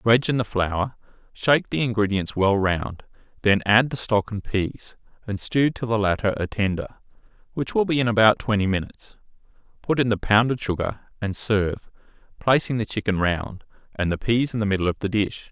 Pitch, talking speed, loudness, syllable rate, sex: 110 Hz, 190 wpm, -23 LUFS, 5.4 syllables/s, male